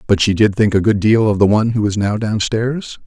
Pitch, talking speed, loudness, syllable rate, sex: 105 Hz, 275 wpm, -15 LUFS, 5.6 syllables/s, male